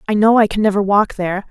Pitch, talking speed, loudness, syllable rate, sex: 205 Hz, 280 wpm, -15 LUFS, 6.9 syllables/s, female